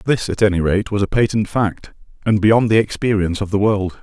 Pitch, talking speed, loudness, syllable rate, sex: 105 Hz, 225 wpm, -17 LUFS, 5.6 syllables/s, male